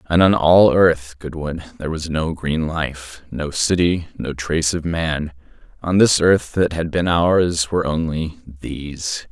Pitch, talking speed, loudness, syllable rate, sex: 80 Hz, 160 wpm, -19 LUFS, 4.0 syllables/s, male